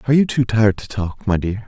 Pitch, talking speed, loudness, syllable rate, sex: 105 Hz, 285 wpm, -19 LUFS, 6.6 syllables/s, male